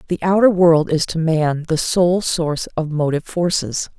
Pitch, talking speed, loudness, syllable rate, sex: 165 Hz, 180 wpm, -17 LUFS, 4.8 syllables/s, female